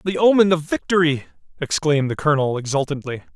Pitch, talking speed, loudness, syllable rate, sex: 155 Hz, 145 wpm, -19 LUFS, 6.5 syllables/s, male